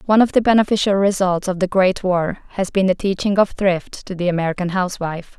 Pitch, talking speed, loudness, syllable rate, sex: 190 Hz, 210 wpm, -18 LUFS, 6.1 syllables/s, female